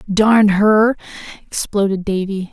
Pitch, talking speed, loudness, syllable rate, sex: 205 Hz, 95 wpm, -15 LUFS, 3.8 syllables/s, female